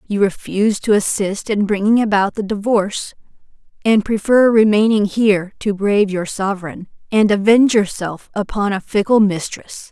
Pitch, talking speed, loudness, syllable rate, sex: 205 Hz, 145 wpm, -16 LUFS, 5.0 syllables/s, female